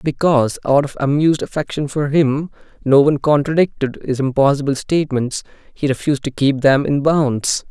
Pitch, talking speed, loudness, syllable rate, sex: 140 Hz, 155 wpm, -17 LUFS, 5.4 syllables/s, male